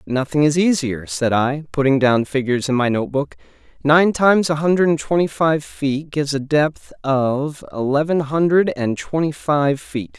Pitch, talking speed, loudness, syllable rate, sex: 140 Hz, 175 wpm, -18 LUFS, 4.6 syllables/s, male